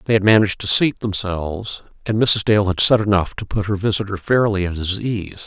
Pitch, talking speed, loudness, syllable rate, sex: 100 Hz, 220 wpm, -18 LUFS, 5.5 syllables/s, male